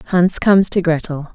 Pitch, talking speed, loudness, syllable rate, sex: 175 Hz, 180 wpm, -15 LUFS, 4.7 syllables/s, female